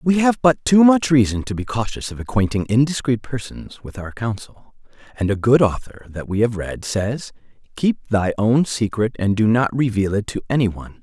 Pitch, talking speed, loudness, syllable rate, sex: 120 Hz, 200 wpm, -19 LUFS, 5.0 syllables/s, male